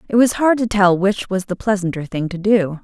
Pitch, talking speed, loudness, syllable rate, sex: 200 Hz, 255 wpm, -17 LUFS, 5.4 syllables/s, female